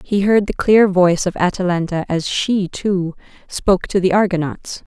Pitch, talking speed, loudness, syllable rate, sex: 185 Hz, 170 wpm, -17 LUFS, 4.8 syllables/s, female